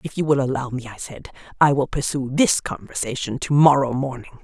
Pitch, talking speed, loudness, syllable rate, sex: 135 Hz, 205 wpm, -20 LUFS, 5.5 syllables/s, female